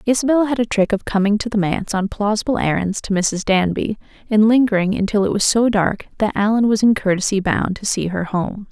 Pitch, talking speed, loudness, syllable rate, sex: 210 Hz, 220 wpm, -18 LUFS, 5.7 syllables/s, female